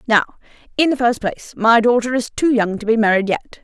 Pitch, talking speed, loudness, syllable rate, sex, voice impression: 230 Hz, 230 wpm, -17 LUFS, 5.7 syllables/s, female, very feminine, young, slightly adult-like, thin, very tensed, slightly powerful, bright, hard, clear, fluent, cute, slightly intellectual, refreshing, very sincere, slightly calm, friendly, reassuring, slightly unique, slightly elegant, wild, slightly sweet, lively, slightly strict, slightly intense, slightly sharp